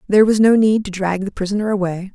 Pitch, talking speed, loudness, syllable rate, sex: 200 Hz, 250 wpm, -17 LUFS, 6.5 syllables/s, female